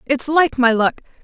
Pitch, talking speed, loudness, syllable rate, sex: 265 Hz, 195 wpm, -16 LUFS, 4.8 syllables/s, female